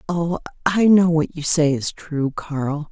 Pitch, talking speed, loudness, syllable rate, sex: 160 Hz, 185 wpm, -19 LUFS, 3.7 syllables/s, female